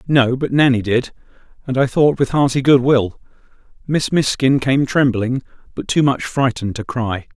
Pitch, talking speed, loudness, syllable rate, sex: 130 Hz, 170 wpm, -17 LUFS, 4.8 syllables/s, male